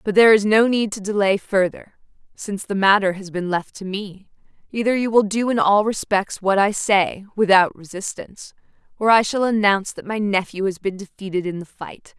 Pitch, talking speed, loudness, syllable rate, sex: 200 Hz, 200 wpm, -19 LUFS, 5.3 syllables/s, female